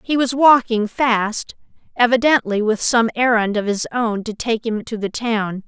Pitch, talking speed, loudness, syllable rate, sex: 230 Hz, 170 wpm, -18 LUFS, 4.3 syllables/s, female